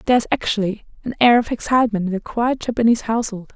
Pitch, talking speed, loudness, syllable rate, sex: 225 Hz, 205 wpm, -19 LUFS, 7.3 syllables/s, female